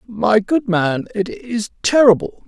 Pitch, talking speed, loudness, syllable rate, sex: 215 Hz, 145 wpm, -17 LUFS, 3.8 syllables/s, male